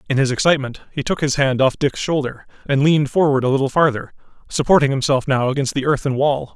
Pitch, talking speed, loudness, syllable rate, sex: 140 Hz, 210 wpm, -18 LUFS, 6.3 syllables/s, male